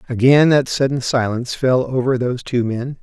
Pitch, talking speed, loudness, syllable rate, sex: 125 Hz, 180 wpm, -17 LUFS, 5.3 syllables/s, male